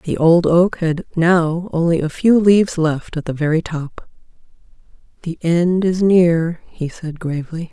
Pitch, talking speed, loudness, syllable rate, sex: 170 Hz, 165 wpm, -17 LUFS, 4.2 syllables/s, female